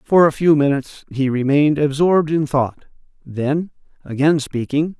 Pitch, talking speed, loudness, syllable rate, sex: 145 Hz, 145 wpm, -17 LUFS, 4.8 syllables/s, male